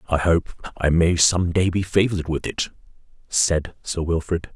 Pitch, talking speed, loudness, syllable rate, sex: 85 Hz, 170 wpm, -21 LUFS, 4.4 syllables/s, male